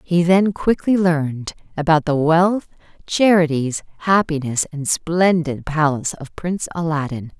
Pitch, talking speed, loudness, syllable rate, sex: 165 Hz, 120 wpm, -18 LUFS, 4.2 syllables/s, female